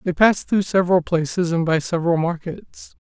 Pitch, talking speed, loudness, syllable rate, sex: 175 Hz, 180 wpm, -19 LUFS, 5.6 syllables/s, male